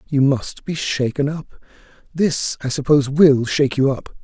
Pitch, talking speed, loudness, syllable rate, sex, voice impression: 140 Hz, 170 wpm, -18 LUFS, 4.6 syllables/s, male, masculine, middle-aged, weak, soft, muffled, slightly halting, slightly raspy, sincere, calm, mature, wild, slightly modest